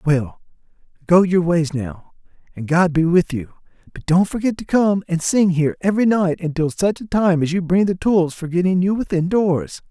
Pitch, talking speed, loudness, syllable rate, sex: 175 Hz, 200 wpm, -18 LUFS, 5.0 syllables/s, male